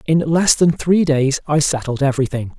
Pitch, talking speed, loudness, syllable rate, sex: 150 Hz, 185 wpm, -16 LUFS, 5.0 syllables/s, male